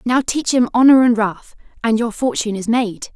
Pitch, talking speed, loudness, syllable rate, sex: 235 Hz, 210 wpm, -16 LUFS, 5.1 syllables/s, female